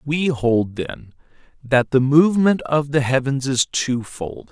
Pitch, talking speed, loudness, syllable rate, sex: 135 Hz, 145 wpm, -19 LUFS, 3.9 syllables/s, male